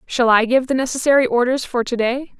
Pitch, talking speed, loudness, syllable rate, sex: 250 Hz, 225 wpm, -17 LUFS, 5.9 syllables/s, female